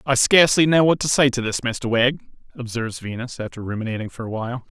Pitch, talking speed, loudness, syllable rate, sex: 125 Hz, 215 wpm, -20 LUFS, 6.4 syllables/s, male